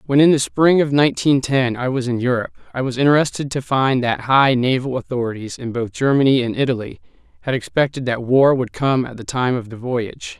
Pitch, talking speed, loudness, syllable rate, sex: 130 Hz, 215 wpm, -18 LUFS, 5.8 syllables/s, male